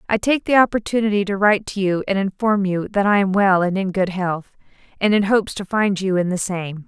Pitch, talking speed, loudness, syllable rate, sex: 195 Hz, 245 wpm, -19 LUFS, 5.6 syllables/s, female